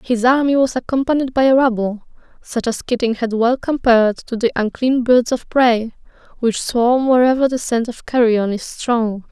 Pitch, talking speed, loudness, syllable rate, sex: 240 Hz, 180 wpm, -17 LUFS, 4.8 syllables/s, female